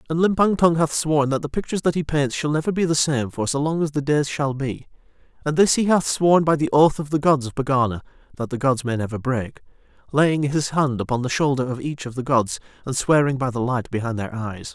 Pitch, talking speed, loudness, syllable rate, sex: 140 Hz, 250 wpm, -21 LUFS, 5.7 syllables/s, male